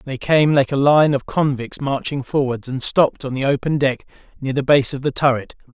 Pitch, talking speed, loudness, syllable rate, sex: 135 Hz, 220 wpm, -18 LUFS, 5.3 syllables/s, male